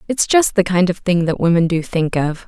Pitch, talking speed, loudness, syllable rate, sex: 180 Hz, 265 wpm, -16 LUFS, 5.1 syllables/s, female